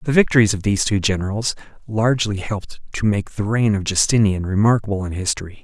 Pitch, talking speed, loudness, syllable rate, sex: 105 Hz, 180 wpm, -19 LUFS, 6.2 syllables/s, male